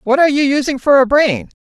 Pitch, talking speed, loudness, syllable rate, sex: 270 Hz, 255 wpm, -13 LUFS, 6.2 syllables/s, female